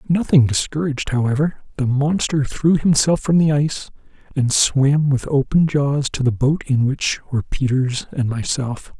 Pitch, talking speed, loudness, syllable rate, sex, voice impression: 140 Hz, 160 wpm, -18 LUFS, 4.7 syllables/s, male, masculine, slightly old, slightly thick, slightly muffled, slightly sincere, calm, slightly elegant